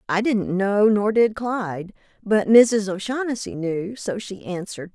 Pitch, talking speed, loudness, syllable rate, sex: 205 Hz, 160 wpm, -21 LUFS, 4.2 syllables/s, female